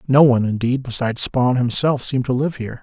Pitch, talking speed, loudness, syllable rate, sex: 125 Hz, 215 wpm, -18 LUFS, 6.3 syllables/s, male